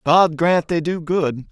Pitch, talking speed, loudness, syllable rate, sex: 165 Hz, 200 wpm, -18 LUFS, 3.7 syllables/s, male